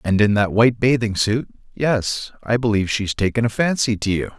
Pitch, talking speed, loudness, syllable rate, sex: 110 Hz, 190 wpm, -19 LUFS, 5.4 syllables/s, male